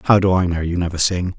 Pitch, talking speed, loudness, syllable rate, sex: 90 Hz, 300 wpm, -18 LUFS, 6.6 syllables/s, male